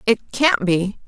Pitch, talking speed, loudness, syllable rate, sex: 210 Hz, 170 wpm, -19 LUFS, 3.8 syllables/s, female